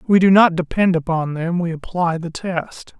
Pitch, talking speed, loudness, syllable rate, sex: 170 Hz, 180 wpm, -18 LUFS, 4.6 syllables/s, male